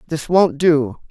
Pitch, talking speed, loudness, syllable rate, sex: 155 Hz, 165 wpm, -16 LUFS, 3.8 syllables/s, male